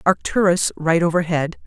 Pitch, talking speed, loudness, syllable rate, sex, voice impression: 170 Hz, 110 wpm, -19 LUFS, 4.8 syllables/s, female, feminine, very adult-like, intellectual, elegant